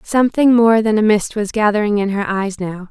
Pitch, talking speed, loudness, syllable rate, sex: 210 Hz, 225 wpm, -15 LUFS, 5.4 syllables/s, female